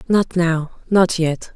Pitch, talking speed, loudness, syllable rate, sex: 175 Hz, 115 wpm, -18 LUFS, 3.1 syllables/s, female